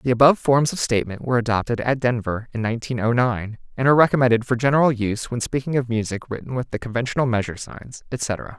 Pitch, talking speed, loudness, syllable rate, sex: 120 Hz, 210 wpm, -21 LUFS, 6.7 syllables/s, male